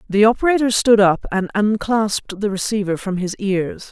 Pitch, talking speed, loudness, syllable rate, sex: 205 Hz, 170 wpm, -18 LUFS, 5.0 syllables/s, female